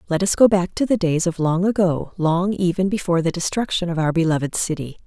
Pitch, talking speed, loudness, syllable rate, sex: 175 Hz, 225 wpm, -20 LUFS, 5.9 syllables/s, female